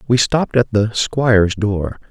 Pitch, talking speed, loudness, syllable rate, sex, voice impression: 110 Hz, 170 wpm, -16 LUFS, 4.5 syllables/s, male, masculine, adult-like, tensed, soft, clear, fluent, cool, intellectual, refreshing, calm, friendly, reassuring, kind, modest